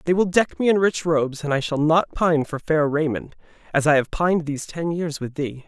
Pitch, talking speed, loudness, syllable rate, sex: 155 Hz, 255 wpm, -21 LUFS, 5.6 syllables/s, male